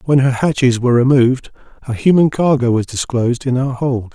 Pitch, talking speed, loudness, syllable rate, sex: 130 Hz, 190 wpm, -15 LUFS, 5.7 syllables/s, male